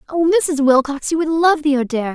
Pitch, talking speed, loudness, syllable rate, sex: 295 Hz, 225 wpm, -16 LUFS, 5.7 syllables/s, female